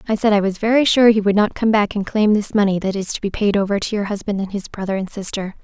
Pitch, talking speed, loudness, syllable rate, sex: 205 Hz, 310 wpm, -18 LUFS, 6.5 syllables/s, female